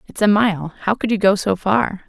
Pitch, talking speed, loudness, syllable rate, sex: 200 Hz, 260 wpm, -18 LUFS, 5.2 syllables/s, female